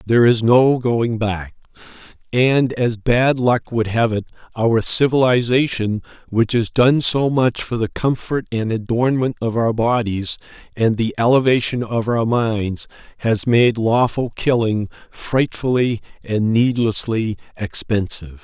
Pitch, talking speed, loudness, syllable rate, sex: 115 Hz, 135 wpm, -18 LUFS, 4.0 syllables/s, male